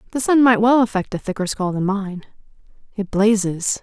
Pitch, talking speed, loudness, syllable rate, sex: 205 Hz, 190 wpm, -18 LUFS, 5.3 syllables/s, female